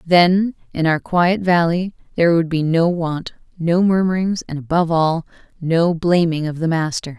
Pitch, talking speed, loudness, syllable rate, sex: 170 Hz, 165 wpm, -18 LUFS, 4.6 syllables/s, female